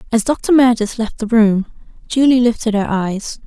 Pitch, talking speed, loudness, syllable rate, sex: 230 Hz, 175 wpm, -15 LUFS, 4.9 syllables/s, female